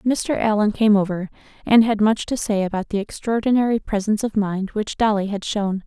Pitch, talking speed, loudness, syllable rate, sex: 210 Hz, 195 wpm, -20 LUFS, 5.3 syllables/s, female